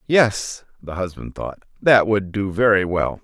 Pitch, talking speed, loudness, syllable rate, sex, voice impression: 100 Hz, 165 wpm, -19 LUFS, 4.0 syllables/s, male, very masculine, very adult-like, very middle-aged, thick, slightly relaxed, slightly powerful, weak, soft, clear, slightly muffled, slightly fluent, cool, intellectual, slightly refreshing, sincere, calm, very mature, friendly, reassuring, unique, slightly elegant, wild, sweet, lively, very kind, intense, slightly modest, slightly light